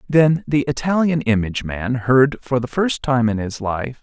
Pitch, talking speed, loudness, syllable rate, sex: 130 Hz, 195 wpm, -19 LUFS, 4.6 syllables/s, male